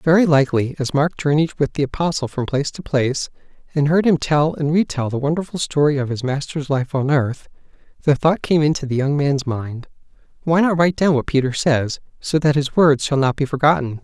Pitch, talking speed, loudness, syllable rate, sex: 145 Hz, 215 wpm, -19 LUFS, 5.6 syllables/s, male